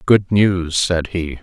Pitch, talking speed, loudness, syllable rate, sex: 90 Hz, 170 wpm, -17 LUFS, 3.1 syllables/s, male